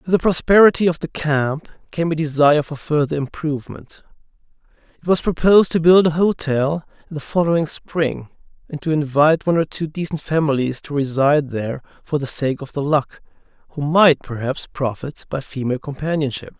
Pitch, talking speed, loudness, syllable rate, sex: 150 Hz, 170 wpm, -19 LUFS, 5.5 syllables/s, male